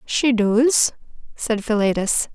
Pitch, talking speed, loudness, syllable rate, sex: 225 Hz, 100 wpm, -19 LUFS, 3.4 syllables/s, female